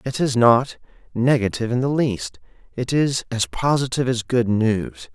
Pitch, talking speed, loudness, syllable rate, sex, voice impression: 120 Hz, 165 wpm, -20 LUFS, 4.6 syllables/s, male, masculine, adult-like, slightly refreshing, sincere, friendly